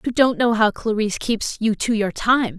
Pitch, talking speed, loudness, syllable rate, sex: 225 Hz, 230 wpm, -20 LUFS, 4.9 syllables/s, female